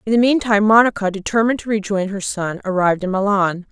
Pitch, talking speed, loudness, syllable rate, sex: 205 Hz, 195 wpm, -17 LUFS, 6.5 syllables/s, female